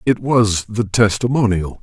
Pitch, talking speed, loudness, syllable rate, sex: 110 Hz, 130 wpm, -16 LUFS, 4.2 syllables/s, male